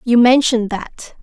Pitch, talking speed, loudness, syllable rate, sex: 240 Hz, 145 wpm, -14 LUFS, 4.7 syllables/s, female